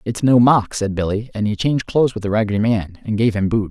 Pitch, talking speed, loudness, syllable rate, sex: 110 Hz, 275 wpm, -18 LUFS, 6.3 syllables/s, male